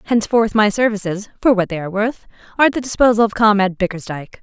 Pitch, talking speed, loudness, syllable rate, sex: 210 Hz, 205 wpm, -17 LUFS, 7.3 syllables/s, female